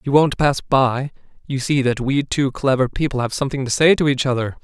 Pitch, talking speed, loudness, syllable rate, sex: 135 Hz, 235 wpm, -19 LUFS, 5.5 syllables/s, male